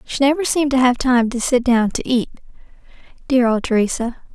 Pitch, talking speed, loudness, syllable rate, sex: 250 Hz, 195 wpm, -17 LUFS, 5.7 syllables/s, female